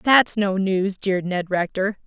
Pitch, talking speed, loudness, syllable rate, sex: 195 Hz, 175 wpm, -21 LUFS, 4.3 syllables/s, female